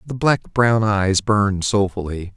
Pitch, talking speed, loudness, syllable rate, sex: 105 Hz, 155 wpm, -19 LUFS, 4.0 syllables/s, male